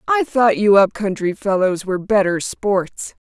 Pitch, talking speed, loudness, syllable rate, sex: 205 Hz, 165 wpm, -17 LUFS, 4.3 syllables/s, female